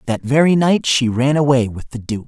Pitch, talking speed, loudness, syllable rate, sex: 130 Hz, 235 wpm, -16 LUFS, 5.2 syllables/s, male